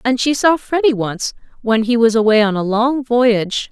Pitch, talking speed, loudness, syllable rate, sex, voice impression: 235 Hz, 210 wpm, -15 LUFS, 4.8 syllables/s, female, very feminine, adult-like, slightly middle-aged, very thin, very tensed, very powerful, very bright, hard, very clear, fluent, slightly cute, cool, very intellectual, refreshing, very sincere, very calm, friendly, reassuring, unique, wild, slightly sweet, very lively, strict, intense, sharp